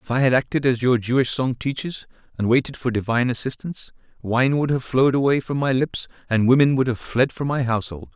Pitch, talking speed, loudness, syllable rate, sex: 125 Hz, 220 wpm, -21 LUFS, 6.1 syllables/s, male